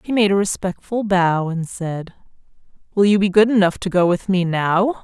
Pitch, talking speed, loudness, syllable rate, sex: 190 Hz, 205 wpm, -18 LUFS, 4.8 syllables/s, female